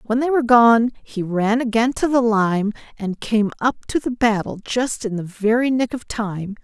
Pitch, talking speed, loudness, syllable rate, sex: 225 Hz, 210 wpm, -19 LUFS, 4.5 syllables/s, female